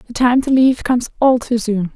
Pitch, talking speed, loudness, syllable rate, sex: 240 Hz, 245 wpm, -15 LUFS, 5.9 syllables/s, female